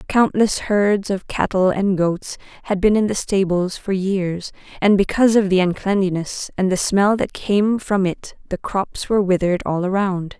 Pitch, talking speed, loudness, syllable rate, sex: 195 Hz, 180 wpm, -19 LUFS, 4.4 syllables/s, female